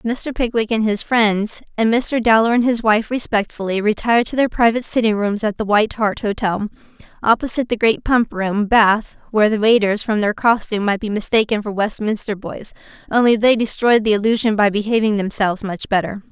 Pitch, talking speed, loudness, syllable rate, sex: 215 Hz, 190 wpm, -17 LUFS, 5.6 syllables/s, female